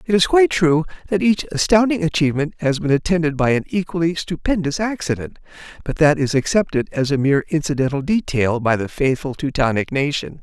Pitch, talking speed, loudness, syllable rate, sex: 155 Hz, 175 wpm, -19 LUFS, 5.8 syllables/s, male